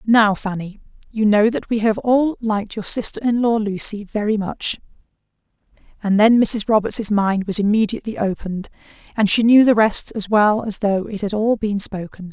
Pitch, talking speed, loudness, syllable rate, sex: 210 Hz, 185 wpm, -18 LUFS, 5.0 syllables/s, female